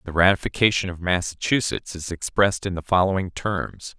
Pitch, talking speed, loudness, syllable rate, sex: 95 Hz, 150 wpm, -22 LUFS, 5.4 syllables/s, male